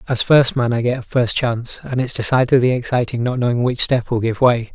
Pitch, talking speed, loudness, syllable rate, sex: 120 Hz, 230 wpm, -17 LUFS, 5.5 syllables/s, male